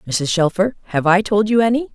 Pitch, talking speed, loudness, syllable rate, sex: 195 Hz, 215 wpm, -17 LUFS, 5.8 syllables/s, female